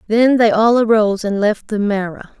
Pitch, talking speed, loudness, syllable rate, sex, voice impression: 215 Hz, 200 wpm, -15 LUFS, 5.0 syllables/s, female, very feminine, slightly young, slightly adult-like, very thin, tensed, slightly powerful, bright, hard, clear, slightly fluent, cute, intellectual, very refreshing, sincere, calm, friendly, reassuring, unique, elegant, sweet, slightly lively, slightly strict, slightly intense